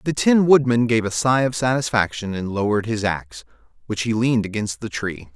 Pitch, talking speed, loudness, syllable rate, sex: 115 Hz, 200 wpm, -20 LUFS, 5.6 syllables/s, male